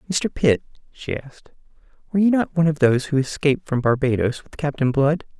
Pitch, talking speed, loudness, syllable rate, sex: 145 Hz, 190 wpm, -21 LUFS, 6.3 syllables/s, male